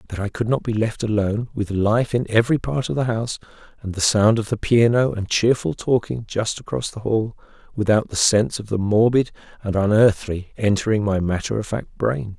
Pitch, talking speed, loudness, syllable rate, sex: 110 Hz, 205 wpm, -20 LUFS, 5.4 syllables/s, male